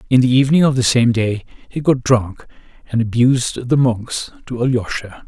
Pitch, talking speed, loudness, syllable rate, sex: 120 Hz, 180 wpm, -16 LUFS, 5.2 syllables/s, male